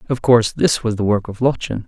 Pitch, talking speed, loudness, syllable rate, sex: 115 Hz, 255 wpm, -17 LUFS, 6.0 syllables/s, male